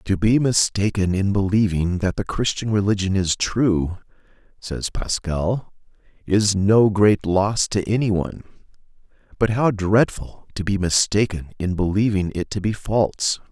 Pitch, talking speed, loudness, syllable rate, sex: 100 Hz, 140 wpm, -20 LUFS, 4.2 syllables/s, male